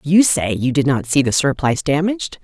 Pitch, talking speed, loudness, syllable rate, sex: 150 Hz, 220 wpm, -17 LUFS, 5.6 syllables/s, female